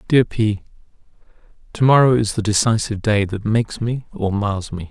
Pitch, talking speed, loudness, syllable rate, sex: 110 Hz, 170 wpm, -18 LUFS, 5.3 syllables/s, male